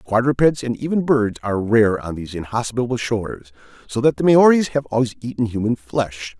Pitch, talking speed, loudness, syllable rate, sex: 115 Hz, 180 wpm, -19 LUFS, 5.6 syllables/s, male